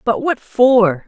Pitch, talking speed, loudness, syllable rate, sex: 230 Hz, 165 wpm, -14 LUFS, 3.1 syllables/s, female